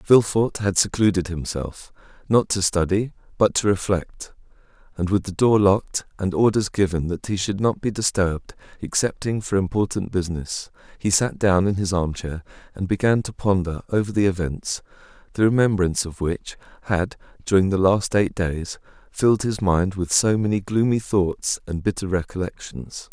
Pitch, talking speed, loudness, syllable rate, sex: 95 Hz, 165 wpm, -22 LUFS, 5.0 syllables/s, male